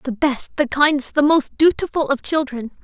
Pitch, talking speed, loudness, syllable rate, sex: 280 Hz, 190 wpm, -18 LUFS, 4.8 syllables/s, female